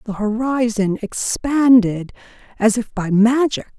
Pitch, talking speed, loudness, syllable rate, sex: 225 Hz, 110 wpm, -17 LUFS, 3.9 syllables/s, female